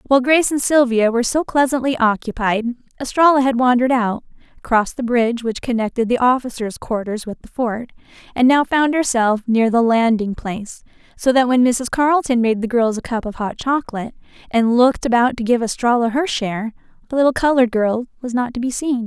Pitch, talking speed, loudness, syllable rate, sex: 240 Hz, 190 wpm, -17 LUFS, 5.8 syllables/s, female